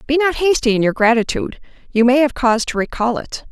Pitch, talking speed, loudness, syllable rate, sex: 255 Hz, 220 wpm, -16 LUFS, 6.3 syllables/s, female